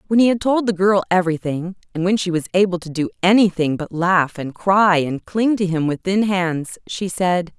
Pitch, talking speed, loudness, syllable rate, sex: 185 Hz, 220 wpm, -19 LUFS, 5.0 syllables/s, female